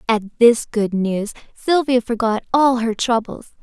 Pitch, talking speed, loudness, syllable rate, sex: 230 Hz, 150 wpm, -18 LUFS, 4.0 syllables/s, female